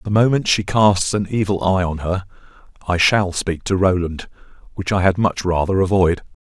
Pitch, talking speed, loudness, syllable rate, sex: 95 Hz, 185 wpm, -18 LUFS, 5.0 syllables/s, male